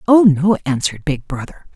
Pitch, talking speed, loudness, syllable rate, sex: 165 Hz, 170 wpm, -16 LUFS, 5.4 syllables/s, female